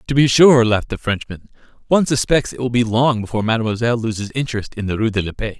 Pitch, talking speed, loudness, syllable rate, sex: 115 Hz, 235 wpm, -17 LUFS, 6.9 syllables/s, male